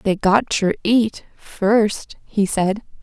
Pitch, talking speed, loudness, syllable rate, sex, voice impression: 205 Hz, 120 wpm, -19 LUFS, 2.9 syllables/s, female, very feminine, slightly young, slightly adult-like, very thin, relaxed, weak, slightly dark, very soft, slightly muffled, slightly halting, very cute, slightly intellectual, sincere, very calm, friendly, reassuring, sweet, kind, modest